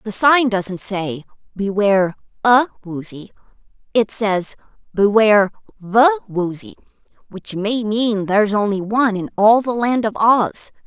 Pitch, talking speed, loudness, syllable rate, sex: 210 Hz, 135 wpm, -17 LUFS, 4.2 syllables/s, female